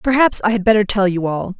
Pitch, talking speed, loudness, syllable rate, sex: 205 Hz, 265 wpm, -16 LUFS, 6.0 syllables/s, female